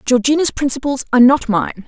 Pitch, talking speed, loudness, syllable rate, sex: 255 Hz, 160 wpm, -15 LUFS, 5.9 syllables/s, female